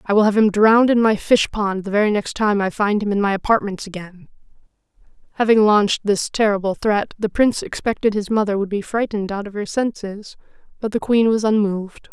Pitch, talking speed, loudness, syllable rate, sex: 210 Hz, 210 wpm, -18 LUFS, 5.8 syllables/s, female